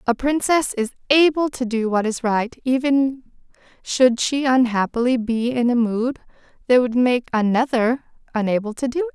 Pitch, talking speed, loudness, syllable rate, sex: 245 Hz, 165 wpm, -20 LUFS, 4.8 syllables/s, female